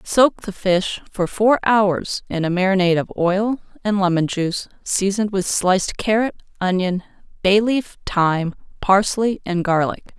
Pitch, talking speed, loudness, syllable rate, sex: 195 Hz, 145 wpm, -19 LUFS, 4.5 syllables/s, female